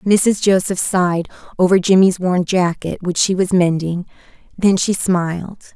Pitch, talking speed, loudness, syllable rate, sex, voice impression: 185 Hz, 145 wpm, -16 LUFS, 4.4 syllables/s, female, feminine, adult-like, slightly relaxed, slightly weak, soft, slightly raspy, intellectual, calm, friendly, reassuring, elegant, kind, modest